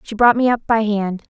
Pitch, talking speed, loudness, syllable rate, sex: 220 Hz, 260 wpm, -17 LUFS, 5.2 syllables/s, female